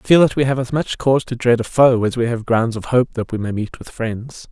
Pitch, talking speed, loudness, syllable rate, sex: 120 Hz, 320 wpm, -18 LUFS, 5.7 syllables/s, male